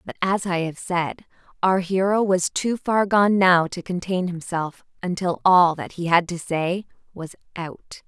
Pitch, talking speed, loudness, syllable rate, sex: 180 Hz, 180 wpm, -21 LUFS, 4.1 syllables/s, female